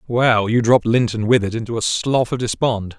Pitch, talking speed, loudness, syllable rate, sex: 115 Hz, 220 wpm, -18 LUFS, 5.3 syllables/s, male